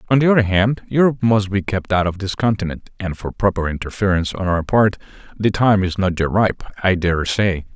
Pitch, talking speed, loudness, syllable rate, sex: 100 Hz, 215 wpm, -18 LUFS, 5.5 syllables/s, male